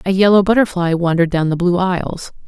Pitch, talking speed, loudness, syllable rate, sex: 180 Hz, 195 wpm, -15 LUFS, 6.3 syllables/s, female